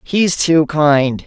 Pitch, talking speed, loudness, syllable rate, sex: 155 Hz, 140 wpm, -14 LUFS, 2.6 syllables/s, female